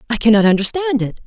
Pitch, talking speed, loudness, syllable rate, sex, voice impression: 240 Hz, 190 wpm, -15 LUFS, 6.9 syllables/s, female, feminine, slightly gender-neutral, adult-like, slightly middle-aged, very thin, tensed, slightly powerful, very bright, very hard, very clear, fluent, slightly cool, slightly intellectual, very refreshing, sincere, friendly, reassuring, very wild, very lively, strict, sharp